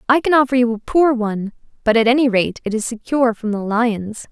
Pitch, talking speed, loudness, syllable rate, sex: 235 Hz, 235 wpm, -17 LUFS, 5.8 syllables/s, female